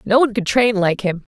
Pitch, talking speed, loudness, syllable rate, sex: 210 Hz, 265 wpm, -17 LUFS, 5.9 syllables/s, female